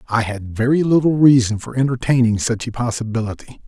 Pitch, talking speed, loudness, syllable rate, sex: 120 Hz, 165 wpm, -17 LUFS, 5.8 syllables/s, male